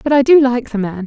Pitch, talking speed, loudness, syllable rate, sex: 245 Hz, 340 wpm, -13 LUFS, 5.8 syllables/s, female